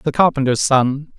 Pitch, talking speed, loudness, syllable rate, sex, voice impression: 140 Hz, 150 wpm, -16 LUFS, 4.5 syllables/s, male, masculine, slightly young, slightly adult-like, slightly relaxed, slightly weak, slightly bright, slightly soft, clear, fluent, cool, intellectual, slightly refreshing, sincere, calm, friendly, reassuring, slightly unique, slightly wild, slightly sweet, very lively, kind, slightly intense